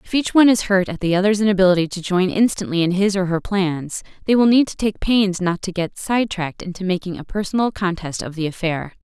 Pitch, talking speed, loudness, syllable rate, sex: 190 Hz, 230 wpm, -19 LUFS, 6.0 syllables/s, female